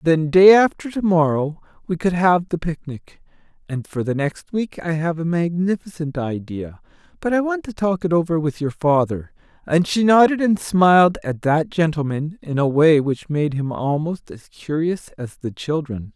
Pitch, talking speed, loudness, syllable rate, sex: 165 Hz, 185 wpm, -19 LUFS, 4.6 syllables/s, male